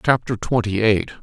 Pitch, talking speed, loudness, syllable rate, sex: 115 Hz, 145 wpm, -20 LUFS, 5.0 syllables/s, male